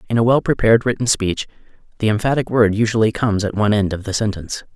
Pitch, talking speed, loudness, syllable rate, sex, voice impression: 110 Hz, 215 wpm, -18 LUFS, 7.1 syllables/s, male, masculine, adult-like, slightly middle-aged, slightly relaxed, slightly weak, slightly dark, hard, very clear, very fluent, slightly cool, very intellectual, slightly refreshing, slightly sincere, slightly calm, slightly friendly, very unique, slightly wild, slightly lively, slightly strict, slightly sharp, modest